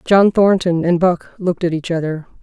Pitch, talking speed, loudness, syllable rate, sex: 175 Hz, 200 wpm, -16 LUFS, 5.3 syllables/s, female